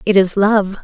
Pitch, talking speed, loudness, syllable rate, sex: 200 Hz, 215 wpm, -14 LUFS, 4.5 syllables/s, female